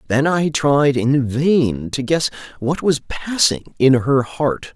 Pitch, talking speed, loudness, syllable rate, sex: 140 Hz, 165 wpm, -18 LUFS, 3.3 syllables/s, male